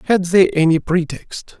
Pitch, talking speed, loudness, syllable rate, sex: 175 Hz, 150 wpm, -16 LUFS, 4.3 syllables/s, male